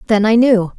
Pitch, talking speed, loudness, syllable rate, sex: 215 Hz, 230 wpm, -13 LUFS, 5.3 syllables/s, female